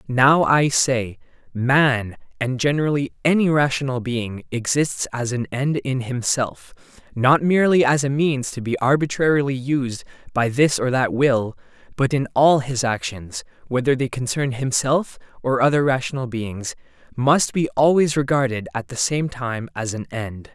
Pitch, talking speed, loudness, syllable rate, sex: 130 Hz, 155 wpm, -20 LUFS, 4.5 syllables/s, male